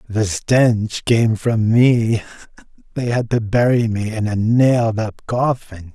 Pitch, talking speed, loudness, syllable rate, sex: 115 Hz, 150 wpm, -17 LUFS, 3.6 syllables/s, male